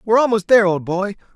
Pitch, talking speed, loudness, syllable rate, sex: 205 Hz, 220 wpm, -17 LUFS, 7.4 syllables/s, male